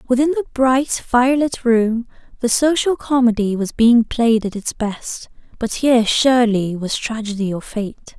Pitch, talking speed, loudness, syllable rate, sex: 235 Hz, 155 wpm, -17 LUFS, 4.4 syllables/s, female